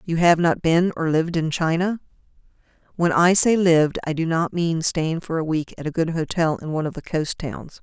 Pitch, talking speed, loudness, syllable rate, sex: 165 Hz, 230 wpm, -21 LUFS, 5.3 syllables/s, female